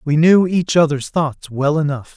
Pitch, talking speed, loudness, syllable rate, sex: 155 Hz, 195 wpm, -16 LUFS, 4.4 syllables/s, male